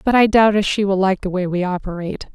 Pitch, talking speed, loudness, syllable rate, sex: 195 Hz, 280 wpm, -18 LUFS, 6.3 syllables/s, female